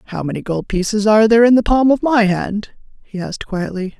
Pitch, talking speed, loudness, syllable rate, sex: 210 Hz, 225 wpm, -15 LUFS, 6.1 syllables/s, female